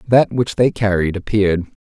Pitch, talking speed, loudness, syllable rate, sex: 105 Hz, 165 wpm, -17 LUFS, 5.3 syllables/s, male